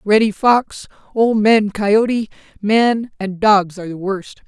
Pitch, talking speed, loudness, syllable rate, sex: 210 Hz, 145 wpm, -16 LUFS, 3.8 syllables/s, female